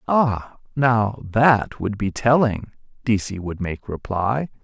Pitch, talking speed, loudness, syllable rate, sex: 110 Hz, 130 wpm, -21 LUFS, 3.3 syllables/s, male